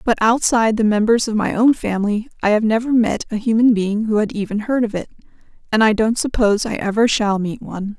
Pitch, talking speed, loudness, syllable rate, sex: 220 Hz, 225 wpm, -17 LUFS, 6.0 syllables/s, female